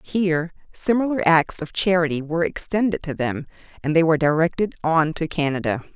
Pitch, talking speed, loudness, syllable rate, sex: 165 Hz, 160 wpm, -21 LUFS, 5.6 syllables/s, female